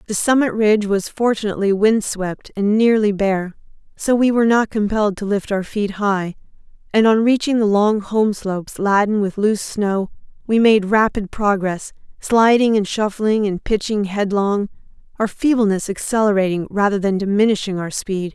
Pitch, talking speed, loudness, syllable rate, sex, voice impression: 205 Hz, 160 wpm, -18 LUFS, 4.9 syllables/s, female, feminine, adult-like, bright, clear, fluent, intellectual, sincere, calm, friendly, reassuring, elegant, kind